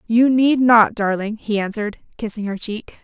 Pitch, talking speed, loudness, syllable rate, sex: 220 Hz, 180 wpm, -18 LUFS, 4.8 syllables/s, female